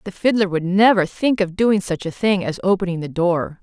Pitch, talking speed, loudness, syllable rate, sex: 190 Hz, 230 wpm, -19 LUFS, 5.2 syllables/s, female